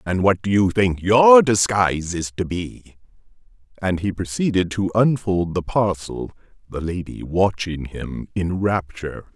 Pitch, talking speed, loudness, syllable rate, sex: 95 Hz, 145 wpm, -20 LUFS, 4.2 syllables/s, male